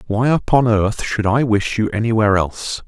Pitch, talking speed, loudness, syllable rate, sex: 110 Hz, 190 wpm, -17 LUFS, 5.2 syllables/s, male